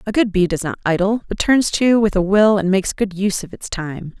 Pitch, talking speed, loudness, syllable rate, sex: 195 Hz, 270 wpm, -18 LUFS, 5.6 syllables/s, female